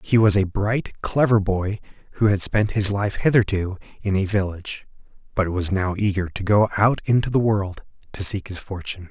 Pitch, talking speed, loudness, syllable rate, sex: 100 Hz, 190 wpm, -21 LUFS, 5.1 syllables/s, male